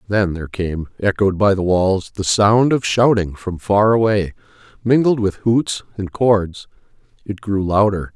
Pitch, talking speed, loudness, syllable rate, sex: 100 Hz, 160 wpm, -17 LUFS, 4.2 syllables/s, male